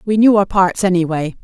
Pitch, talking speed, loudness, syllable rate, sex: 190 Hz, 210 wpm, -14 LUFS, 5.6 syllables/s, female